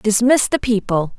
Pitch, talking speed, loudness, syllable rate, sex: 220 Hz, 150 wpm, -17 LUFS, 4.4 syllables/s, female